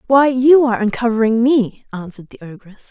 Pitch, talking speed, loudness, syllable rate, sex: 235 Hz, 165 wpm, -14 LUFS, 5.6 syllables/s, female